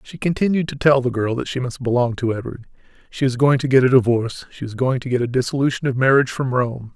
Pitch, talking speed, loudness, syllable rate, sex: 130 Hz, 260 wpm, -19 LUFS, 6.4 syllables/s, male